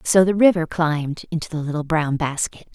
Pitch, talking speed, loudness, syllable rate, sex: 160 Hz, 195 wpm, -20 LUFS, 5.5 syllables/s, female